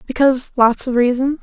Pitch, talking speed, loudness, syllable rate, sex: 255 Hz, 125 wpm, -16 LUFS, 5.8 syllables/s, female